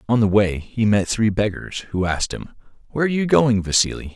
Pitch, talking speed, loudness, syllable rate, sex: 110 Hz, 215 wpm, -20 LUFS, 5.9 syllables/s, male